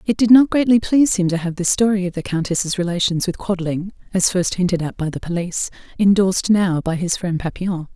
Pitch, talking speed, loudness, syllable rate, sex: 185 Hz, 220 wpm, -18 LUFS, 5.9 syllables/s, female